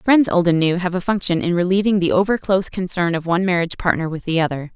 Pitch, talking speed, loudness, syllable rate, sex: 180 Hz, 240 wpm, -19 LUFS, 6.7 syllables/s, female